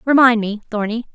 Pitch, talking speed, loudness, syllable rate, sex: 230 Hz, 155 wpm, -17 LUFS, 5.4 syllables/s, female